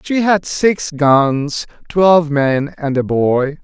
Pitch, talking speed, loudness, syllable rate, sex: 155 Hz, 150 wpm, -15 LUFS, 3.0 syllables/s, male